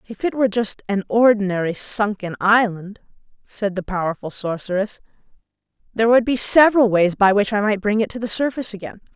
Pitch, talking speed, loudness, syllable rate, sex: 210 Hz, 175 wpm, -19 LUFS, 5.8 syllables/s, female